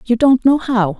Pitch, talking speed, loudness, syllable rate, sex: 235 Hz, 240 wpm, -14 LUFS, 4.5 syllables/s, female